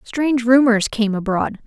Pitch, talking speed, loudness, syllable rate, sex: 235 Hz, 145 wpm, -17 LUFS, 4.5 syllables/s, female